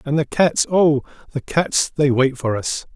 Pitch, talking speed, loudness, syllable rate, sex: 145 Hz, 180 wpm, -18 LUFS, 4.2 syllables/s, male